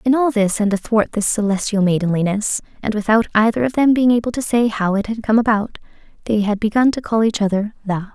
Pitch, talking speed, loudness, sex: 215 Hz, 220 wpm, -17 LUFS, female